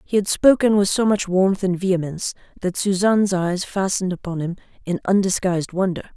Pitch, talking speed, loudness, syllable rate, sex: 190 Hz, 175 wpm, -20 LUFS, 5.8 syllables/s, female